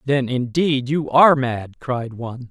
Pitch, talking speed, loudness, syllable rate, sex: 130 Hz, 165 wpm, -19 LUFS, 4.3 syllables/s, male